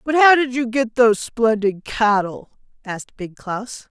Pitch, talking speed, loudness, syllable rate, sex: 230 Hz, 165 wpm, -18 LUFS, 4.2 syllables/s, female